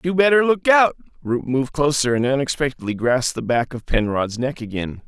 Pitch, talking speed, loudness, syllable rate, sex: 135 Hz, 190 wpm, -20 LUFS, 5.5 syllables/s, male